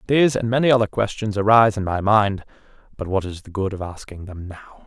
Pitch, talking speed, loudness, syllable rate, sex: 105 Hz, 220 wpm, -20 LUFS, 6.4 syllables/s, male